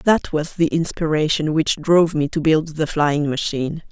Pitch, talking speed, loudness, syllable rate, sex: 155 Hz, 185 wpm, -19 LUFS, 4.7 syllables/s, female